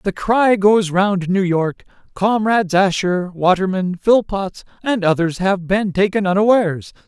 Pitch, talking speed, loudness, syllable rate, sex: 195 Hz, 135 wpm, -17 LUFS, 4.2 syllables/s, male